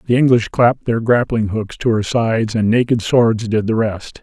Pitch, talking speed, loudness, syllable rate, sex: 115 Hz, 215 wpm, -16 LUFS, 4.9 syllables/s, male